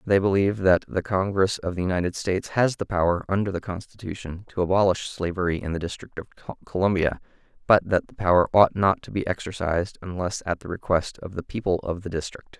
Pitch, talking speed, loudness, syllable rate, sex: 90 Hz, 200 wpm, -24 LUFS, 6.0 syllables/s, male